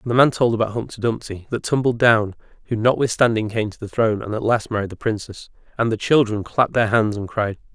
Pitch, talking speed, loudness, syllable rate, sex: 110 Hz, 230 wpm, -20 LUFS, 6.2 syllables/s, male